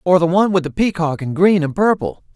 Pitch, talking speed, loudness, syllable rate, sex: 170 Hz, 255 wpm, -16 LUFS, 6.0 syllables/s, male